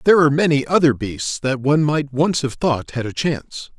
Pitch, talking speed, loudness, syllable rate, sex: 145 Hz, 220 wpm, -18 LUFS, 5.5 syllables/s, male